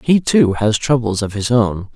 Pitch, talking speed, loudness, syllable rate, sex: 115 Hz, 215 wpm, -16 LUFS, 4.4 syllables/s, male